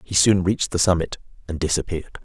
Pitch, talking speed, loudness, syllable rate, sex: 85 Hz, 190 wpm, -21 LUFS, 6.6 syllables/s, male